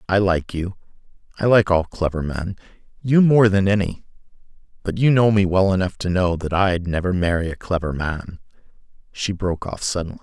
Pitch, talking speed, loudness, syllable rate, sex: 95 Hz, 170 wpm, -20 LUFS, 5.4 syllables/s, male